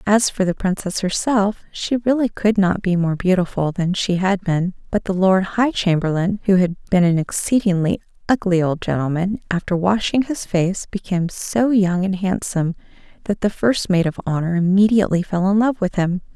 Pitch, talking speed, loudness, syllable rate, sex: 190 Hz, 185 wpm, -19 LUFS, 5.0 syllables/s, female